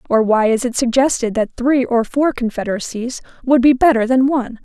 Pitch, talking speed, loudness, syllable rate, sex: 245 Hz, 195 wpm, -16 LUFS, 5.5 syllables/s, female